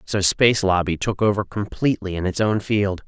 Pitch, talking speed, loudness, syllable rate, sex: 100 Hz, 195 wpm, -20 LUFS, 5.4 syllables/s, male